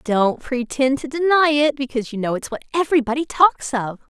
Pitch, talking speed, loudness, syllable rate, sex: 265 Hz, 215 wpm, -19 LUFS, 5.8 syllables/s, female